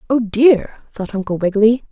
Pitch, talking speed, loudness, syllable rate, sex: 220 Hz, 155 wpm, -16 LUFS, 5.0 syllables/s, female